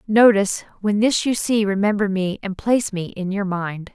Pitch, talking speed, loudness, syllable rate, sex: 200 Hz, 200 wpm, -20 LUFS, 5.0 syllables/s, female